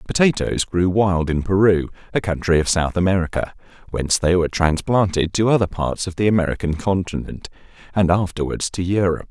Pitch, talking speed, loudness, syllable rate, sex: 90 Hz, 160 wpm, -19 LUFS, 5.7 syllables/s, male